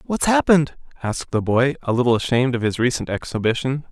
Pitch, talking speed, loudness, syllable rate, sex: 130 Hz, 185 wpm, -20 LUFS, 6.4 syllables/s, male